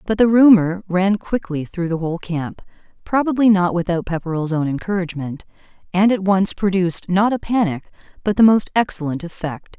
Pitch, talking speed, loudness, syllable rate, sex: 185 Hz, 165 wpm, -18 LUFS, 5.4 syllables/s, female